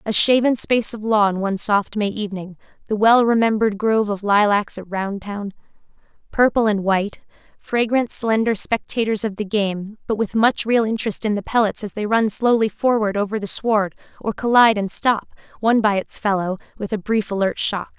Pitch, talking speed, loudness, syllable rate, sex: 210 Hz, 180 wpm, -19 LUFS, 5.3 syllables/s, female